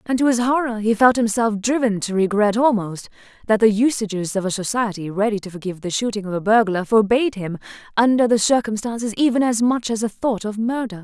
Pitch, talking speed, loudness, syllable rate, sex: 220 Hz, 205 wpm, -19 LUFS, 5.9 syllables/s, female